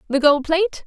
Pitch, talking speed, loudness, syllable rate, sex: 315 Hz, 210 wpm, -18 LUFS, 5.8 syllables/s, female